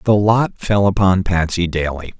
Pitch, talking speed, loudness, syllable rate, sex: 95 Hz, 165 wpm, -16 LUFS, 4.4 syllables/s, male